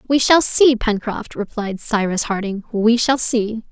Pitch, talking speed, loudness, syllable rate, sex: 225 Hz, 160 wpm, -17 LUFS, 4.1 syllables/s, female